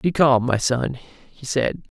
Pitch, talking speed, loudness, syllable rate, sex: 130 Hz, 180 wpm, -21 LUFS, 3.6 syllables/s, male